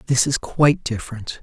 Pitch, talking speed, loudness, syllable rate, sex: 130 Hz, 170 wpm, -20 LUFS, 5.7 syllables/s, male